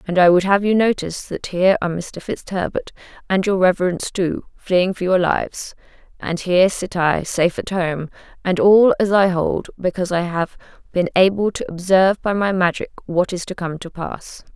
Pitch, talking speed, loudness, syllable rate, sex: 185 Hz, 195 wpm, -19 LUFS, 5.2 syllables/s, female